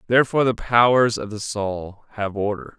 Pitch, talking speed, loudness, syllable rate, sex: 110 Hz, 170 wpm, -20 LUFS, 5.3 syllables/s, male